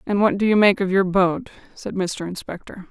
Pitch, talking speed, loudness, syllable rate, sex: 190 Hz, 225 wpm, -20 LUFS, 5.1 syllables/s, female